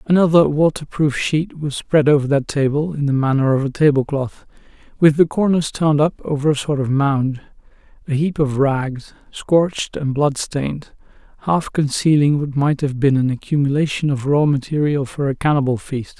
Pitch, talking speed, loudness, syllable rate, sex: 145 Hz, 170 wpm, -18 LUFS, 5.0 syllables/s, male